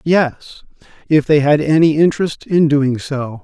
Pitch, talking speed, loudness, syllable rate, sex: 150 Hz, 155 wpm, -15 LUFS, 4.2 syllables/s, male